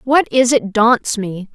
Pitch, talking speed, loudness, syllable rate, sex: 230 Hz, 195 wpm, -15 LUFS, 3.6 syllables/s, female